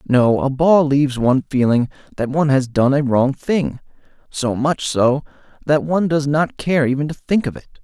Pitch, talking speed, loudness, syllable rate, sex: 140 Hz, 190 wpm, -17 LUFS, 5.1 syllables/s, male